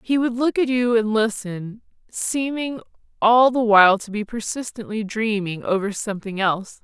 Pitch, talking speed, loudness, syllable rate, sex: 220 Hz, 160 wpm, -20 LUFS, 4.8 syllables/s, female